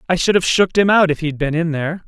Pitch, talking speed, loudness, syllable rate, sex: 170 Hz, 320 wpm, -16 LUFS, 6.9 syllables/s, male